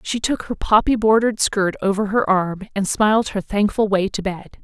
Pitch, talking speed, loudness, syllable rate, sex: 205 Hz, 205 wpm, -19 LUFS, 5.1 syllables/s, female